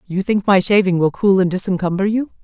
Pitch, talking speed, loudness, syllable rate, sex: 190 Hz, 220 wpm, -16 LUFS, 5.8 syllables/s, female